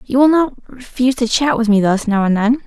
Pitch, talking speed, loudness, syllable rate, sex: 240 Hz, 270 wpm, -15 LUFS, 5.6 syllables/s, female